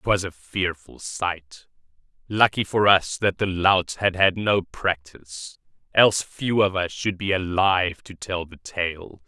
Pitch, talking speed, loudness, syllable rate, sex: 90 Hz, 160 wpm, -22 LUFS, 3.9 syllables/s, male